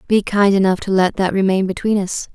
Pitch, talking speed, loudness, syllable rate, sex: 195 Hz, 230 wpm, -17 LUFS, 5.5 syllables/s, female